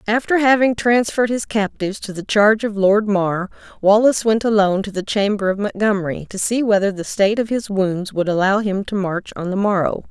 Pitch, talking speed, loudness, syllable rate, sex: 205 Hz, 210 wpm, -18 LUFS, 5.7 syllables/s, female